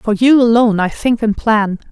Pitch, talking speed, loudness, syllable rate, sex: 225 Hz, 220 wpm, -13 LUFS, 5.1 syllables/s, female